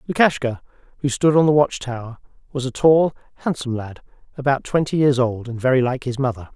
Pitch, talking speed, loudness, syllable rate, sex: 130 Hz, 190 wpm, -20 LUFS, 6.0 syllables/s, male